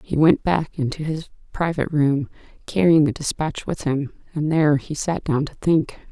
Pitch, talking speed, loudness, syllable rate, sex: 150 Hz, 185 wpm, -21 LUFS, 4.9 syllables/s, female